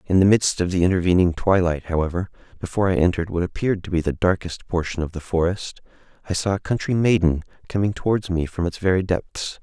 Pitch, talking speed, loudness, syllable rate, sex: 90 Hz, 205 wpm, -22 LUFS, 6.3 syllables/s, male